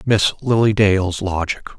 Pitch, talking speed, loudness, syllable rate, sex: 100 Hz, 135 wpm, -17 LUFS, 3.9 syllables/s, male